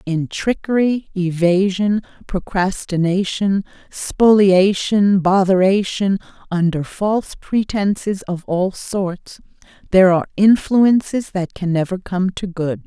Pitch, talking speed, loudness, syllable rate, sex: 190 Hz, 100 wpm, -17 LUFS, 3.8 syllables/s, female